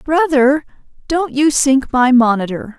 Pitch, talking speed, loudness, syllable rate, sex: 275 Hz, 130 wpm, -14 LUFS, 4.0 syllables/s, female